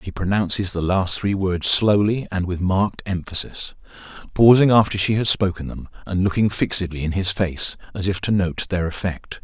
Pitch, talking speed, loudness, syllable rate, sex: 95 Hz, 185 wpm, -20 LUFS, 5.1 syllables/s, male